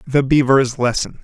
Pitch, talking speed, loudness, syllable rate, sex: 135 Hz, 145 wpm, -16 LUFS, 4.6 syllables/s, male